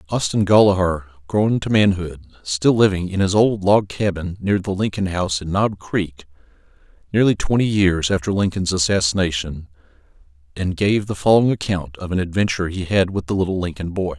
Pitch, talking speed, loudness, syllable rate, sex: 90 Hz, 170 wpm, -19 LUFS, 5.4 syllables/s, male